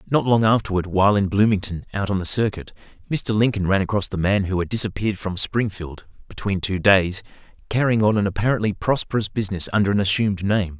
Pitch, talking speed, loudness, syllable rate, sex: 100 Hz, 190 wpm, -21 LUFS, 6.1 syllables/s, male